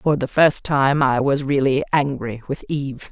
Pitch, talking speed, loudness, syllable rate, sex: 140 Hz, 195 wpm, -19 LUFS, 4.5 syllables/s, female